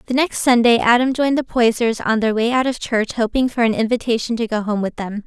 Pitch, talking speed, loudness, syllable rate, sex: 235 Hz, 250 wpm, -18 LUFS, 6.0 syllables/s, female